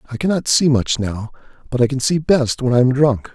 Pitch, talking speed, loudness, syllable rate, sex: 130 Hz, 250 wpm, -17 LUFS, 5.6 syllables/s, male